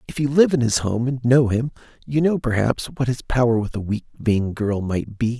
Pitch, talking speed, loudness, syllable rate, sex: 120 Hz, 245 wpm, -21 LUFS, 5.0 syllables/s, male